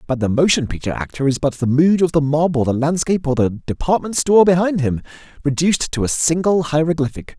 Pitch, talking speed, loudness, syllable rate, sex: 150 Hz, 210 wpm, -17 LUFS, 6.2 syllables/s, male